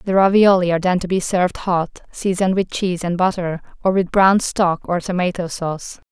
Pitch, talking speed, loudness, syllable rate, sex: 180 Hz, 195 wpm, -18 LUFS, 5.5 syllables/s, female